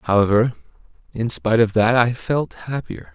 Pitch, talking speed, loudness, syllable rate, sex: 110 Hz, 155 wpm, -19 LUFS, 4.7 syllables/s, male